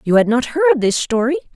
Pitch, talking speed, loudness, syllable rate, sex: 255 Hz, 230 wpm, -16 LUFS, 5.4 syllables/s, female